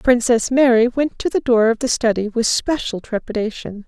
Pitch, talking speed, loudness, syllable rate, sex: 235 Hz, 185 wpm, -18 LUFS, 5.0 syllables/s, female